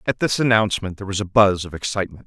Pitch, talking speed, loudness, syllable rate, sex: 100 Hz, 240 wpm, -20 LUFS, 7.4 syllables/s, male